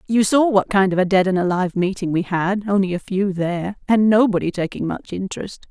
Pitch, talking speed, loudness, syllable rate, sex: 190 Hz, 220 wpm, -19 LUFS, 5.7 syllables/s, female